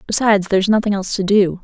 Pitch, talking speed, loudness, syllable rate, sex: 200 Hz, 255 wpm, -16 LUFS, 8.1 syllables/s, female